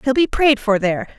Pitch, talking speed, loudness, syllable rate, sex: 245 Hz, 255 wpm, -17 LUFS, 6.0 syllables/s, female